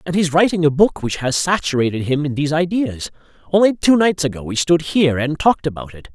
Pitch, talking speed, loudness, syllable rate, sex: 155 Hz, 225 wpm, -17 LUFS, 6.1 syllables/s, male